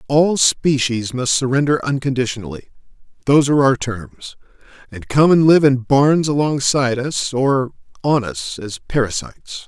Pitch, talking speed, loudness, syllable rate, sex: 130 Hz, 125 wpm, -17 LUFS, 4.8 syllables/s, male